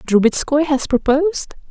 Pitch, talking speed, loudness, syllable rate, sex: 280 Hz, 105 wpm, -16 LUFS, 4.6 syllables/s, female